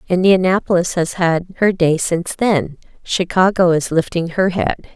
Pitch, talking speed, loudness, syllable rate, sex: 175 Hz, 145 wpm, -16 LUFS, 4.6 syllables/s, female